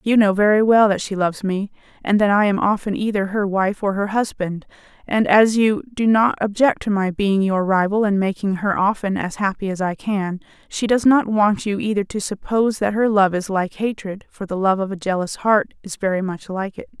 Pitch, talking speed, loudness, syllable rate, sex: 200 Hz, 230 wpm, -19 LUFS, 5.2 syllables/s, female